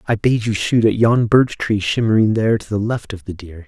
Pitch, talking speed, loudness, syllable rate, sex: 105 Hz, 260 wpm, -17 LUFS, 5.4 syllables/s, male